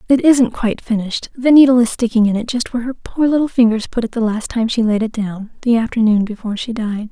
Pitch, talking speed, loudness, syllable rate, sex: 230 Hz, 245 wpm, -16 LUFS, 6.2 syllables/s, female